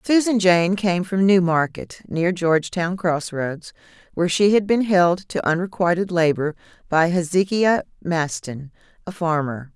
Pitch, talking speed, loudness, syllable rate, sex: 175 Hz, 140 wpm, -20 LUFS, 4.4 syllables/s, female